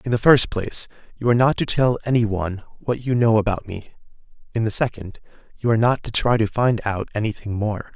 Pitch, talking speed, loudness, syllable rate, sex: 110 Hz, 220 wpm, -21 LUFS, 6.0 syllables/s, male